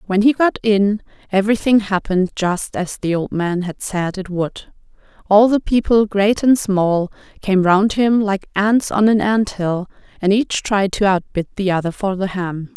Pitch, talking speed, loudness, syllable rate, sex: 200 Hz, 190 wpm, -17 LUFS, 4.4 syllables/s, female